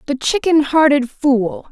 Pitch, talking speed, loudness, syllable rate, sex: 280 Hz, 140 wpm, -15 LUFS, 4.0 syllables/s, female